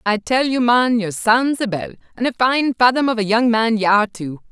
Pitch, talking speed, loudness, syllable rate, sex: 230 Hz, 250 wpm, -17 LUFS, 5.4 syllables/s, female